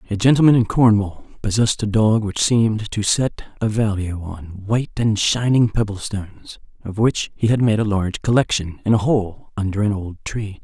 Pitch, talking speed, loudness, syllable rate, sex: 105 Hz, 190 wpm, -19 LUFS, 5.1 syllables/s, male